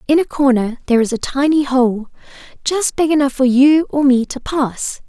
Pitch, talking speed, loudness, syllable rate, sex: 270 Hz, 200 wpm, -15 LUFS, 4.9 syllables/s, female